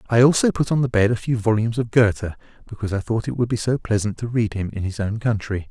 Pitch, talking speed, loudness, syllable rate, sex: 110 Hz, 275 wpm, -21 LUFS, 6.6 syllables/s, male